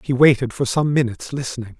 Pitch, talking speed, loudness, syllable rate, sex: 130 Hz, 200 wpm, -19 LUFS, 6.5 syllables/s, male